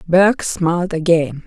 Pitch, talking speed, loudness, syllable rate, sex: 175 Hz, 125 wpm, -16 LUFS, 3.8 syllables/s, female